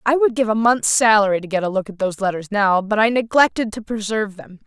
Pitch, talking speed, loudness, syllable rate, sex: 210 Hz, 255 wpm, -18 LUFS, 6.2 syllables/s, female